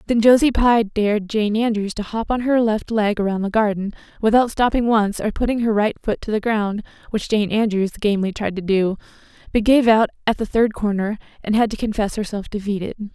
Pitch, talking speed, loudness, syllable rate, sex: 215 Hz, 210 wpm, -19 LUFS, 5.5 syllables/s, female